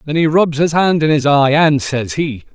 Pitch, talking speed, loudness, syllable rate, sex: 150 Hz, 260 wpm, -14 LUFS, 4.7 syllables/s, male